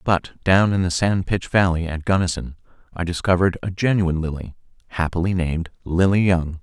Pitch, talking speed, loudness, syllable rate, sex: 90 Hz, 165 wpm, -21 LUFS, 5.2 syllables/s, male